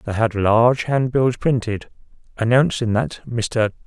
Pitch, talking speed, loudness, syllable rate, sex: 115 Hz, 125 wpm, -19 LUFS, 4.2 syllables/s, male